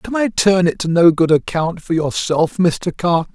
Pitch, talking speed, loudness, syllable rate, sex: 175 Hz, 215 wpm, -16 LUFS, 4.5 syllables/s, male